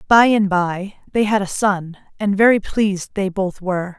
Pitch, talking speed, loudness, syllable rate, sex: 195 Hz, 195 wpm, -18 LUFS, 4.7 syllables/s, female